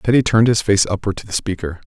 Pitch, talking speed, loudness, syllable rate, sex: 105 Hz, 250 wpm, -17 LUFS, 6.7 syllables/s, male